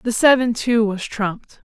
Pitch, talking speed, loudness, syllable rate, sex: 225 Hz, 175 wpm, -18 LUFS, 4.4 syllables/s, female